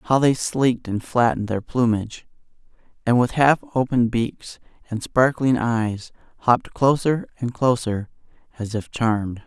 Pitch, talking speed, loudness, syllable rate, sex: 120 Hz, 140 wpm, -21 LUFS, 4.5 syllables/s, male